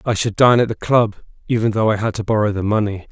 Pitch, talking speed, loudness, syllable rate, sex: 110 Hz, 270 wpm, -17 LUFS, 6.4 syllables/s, male